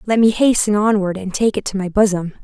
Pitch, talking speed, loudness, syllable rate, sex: 205 Hz, 245 wpm, -16 LUFS, 5.8 syllables/s, female